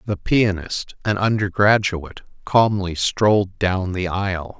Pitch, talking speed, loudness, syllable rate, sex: 100 Hz, 115 wpm, -20 LUFS, 4.1 syllables/s, male